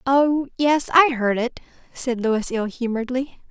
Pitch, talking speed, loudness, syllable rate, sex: 255 Hz, 155 wpm, -21 LUFS, 4.3 syllables/s, female